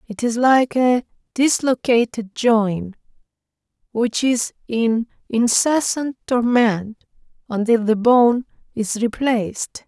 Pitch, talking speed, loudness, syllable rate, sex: 235 Hz, 95 wpm, -19 LUFS, 3.5 syllables/s, female